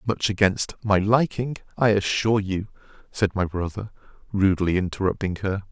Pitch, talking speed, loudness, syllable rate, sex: 100 Hz, 135 wpm, -23 LUFS, 5.2 syllables/s, male